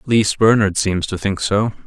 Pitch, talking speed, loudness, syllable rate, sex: 100 Hz, 225 wpm, -17 LUFS, 4.7 syllables/s, male